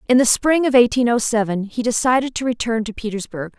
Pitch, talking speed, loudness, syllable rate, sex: 235 Hz, 215 wpm, -18 LUFS, 5.9 syllables/s, female